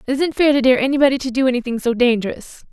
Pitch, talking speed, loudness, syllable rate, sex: 255 Hz, 245 wpm, -17 LUFS, 7.1 syllables/s, female